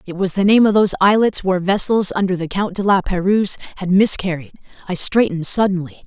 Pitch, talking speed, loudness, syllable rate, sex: 190 Hz, 200 wpm, -17 LUFS, 6.1 syllables/s, female